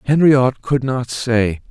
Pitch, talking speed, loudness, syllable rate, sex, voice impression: 125 Hz, 140 wpm, -16 LUFS, 3.3 syllables/s, male, masculine, middle-aged, slightly relaxed, soft, slightly fluent, slightly raspy, intellectual, calm, friendly, wild, kind, modest